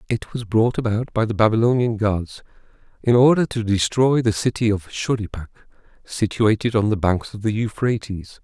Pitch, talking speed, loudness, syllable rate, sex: 110 Hz, 165 wpm, -20 LUFS, 5.1 syllables/s, male